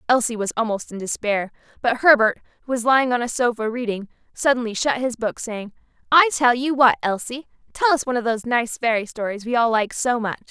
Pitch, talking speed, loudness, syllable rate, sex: 235 Hz, 210 wpm, -20 LUFS, 5.8 syllables/s, female